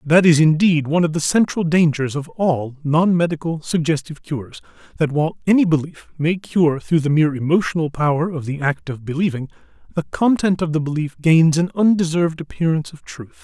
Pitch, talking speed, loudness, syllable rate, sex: 160 Hz, 185 wpm, -18 LUFS, 5.7 syllables/s, male